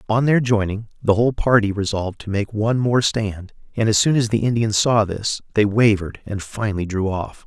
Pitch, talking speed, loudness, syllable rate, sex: 105 Hz, 210 wpm, -20 LUFS, 5.5 syllables/s, male